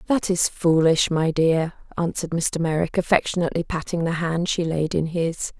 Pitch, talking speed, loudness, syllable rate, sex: 170 Hz, 170 wpm, -22 LUFS, 5.1 syllables/s, female